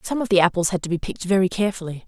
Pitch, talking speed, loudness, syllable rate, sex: 190 Hz, 290 wpm, -21 LUFS, 8.2 syllables/s, female